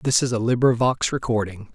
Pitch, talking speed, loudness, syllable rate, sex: 120 Hz, 170 wpm, -21 LUFS, 5.4 syllables/s, male